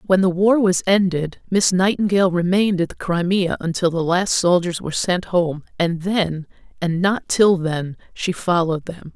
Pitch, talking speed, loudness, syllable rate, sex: 180 Hz, 175 wpm, -19 LUFS, 4.7 syllables/s, female